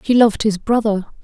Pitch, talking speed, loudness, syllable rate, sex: 215 Hz, 195 wpm, -17 LUFS, 6.1 syllables/s, female